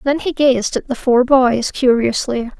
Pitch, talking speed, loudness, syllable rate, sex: 255 Hz, 185 wpm, -15 LUFS, 4.1 syllables/s, female